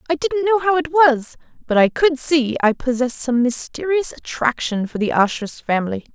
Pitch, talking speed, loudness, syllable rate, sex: 275 Hz, 185 wpm, -18 LUFS, 5.1 syllables/s, female